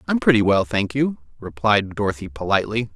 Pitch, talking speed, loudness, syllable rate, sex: 105 Hz, 165 wpm, -20 LUFS, 5.8 syllables/s, male